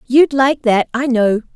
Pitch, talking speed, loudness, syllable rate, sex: 250 Hz, 195 wpm, -14 LUFS, 4.0 syllables/s, female